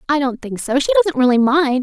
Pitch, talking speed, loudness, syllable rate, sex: 280 Hz, 230 wpm, -16 LUFS, 5.9 syllables/s, female